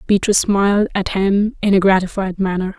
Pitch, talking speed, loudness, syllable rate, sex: 195 Hz, 170 wpm, -16 LUFS, 5.6 syllables/s, female